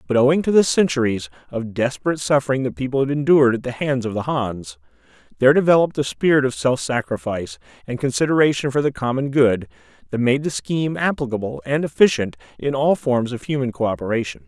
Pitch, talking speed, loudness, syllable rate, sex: 130 Hz, 180 wpm, -20 LUFS, 6.3 syllables/s, male